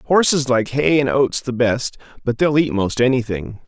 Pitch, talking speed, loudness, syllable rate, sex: 125 Hz, 195 wpm, -18 LUFS, 4.5 syllables/s, male